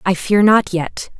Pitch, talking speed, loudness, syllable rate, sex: 190 Hz, 200 wpm, -15 LUFS, 3.8 syllables/s, female